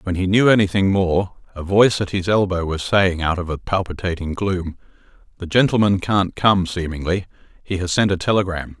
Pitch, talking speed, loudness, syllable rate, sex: 95 Hz, 185 wpm, -19 LUFS, 5.3 syllables/s, male